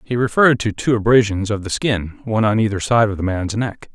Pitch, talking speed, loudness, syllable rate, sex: 110 Hz, 230 wpm, -18 LUFS, 5.8 syllables/s, male